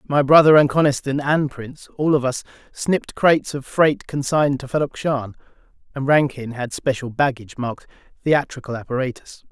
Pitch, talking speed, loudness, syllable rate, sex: 135 Hz, 150 wpm, -20 LUFS, 5.5 syllables/s, male